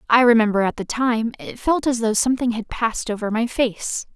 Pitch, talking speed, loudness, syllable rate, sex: 230 Hz, 215 wpm, -20 LUFS, 5.4 syllables/s, female